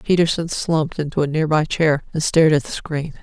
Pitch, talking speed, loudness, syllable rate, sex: 155 Hz, 205 wpm, -19 LUFS, 5.7 syllables/s, female